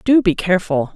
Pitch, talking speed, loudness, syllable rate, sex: 190 Hz, 190 wpm, -17 LUFS, 5.9 syllables/s, female